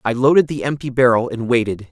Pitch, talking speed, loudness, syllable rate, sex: 125 Hz, 220 wpm, -17 LUFS, 6.1 syllables/s, male